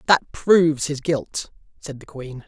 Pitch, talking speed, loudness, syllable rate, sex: 145 Hz, 170 wpm, -20 LUFS, 3.9 syllables/s, male